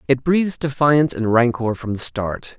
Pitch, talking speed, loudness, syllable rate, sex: 130 Hz, 185 wpm, -19 LUFS, 4.9 syllables/s, male